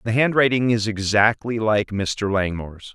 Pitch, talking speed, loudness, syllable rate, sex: 110 Hz, 140 wpm, -20 LUFS, 4.6 syllables/s, male